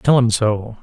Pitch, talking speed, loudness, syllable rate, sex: 115 Hz, 220 wpm, -17 LUFS, 3.9 syllables/s, male